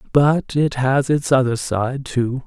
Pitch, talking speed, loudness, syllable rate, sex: 130 Hz, 170 wpm, -19 LUFS, 3.6 syllables/s, male